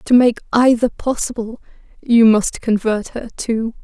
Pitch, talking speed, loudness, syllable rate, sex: 230 Hz, 140 wpm, -16 LUFS, 4.2 syllables/s, female